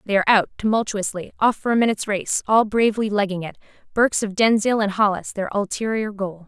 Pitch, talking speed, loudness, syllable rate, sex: 205 Hz, 195 wpm, -21 LUFS, 6.3 syllables/s, female